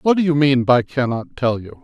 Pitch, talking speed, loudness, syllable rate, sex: 135 Hz, 260 wpm, -18 LUFS, 5.1 syllables/s, male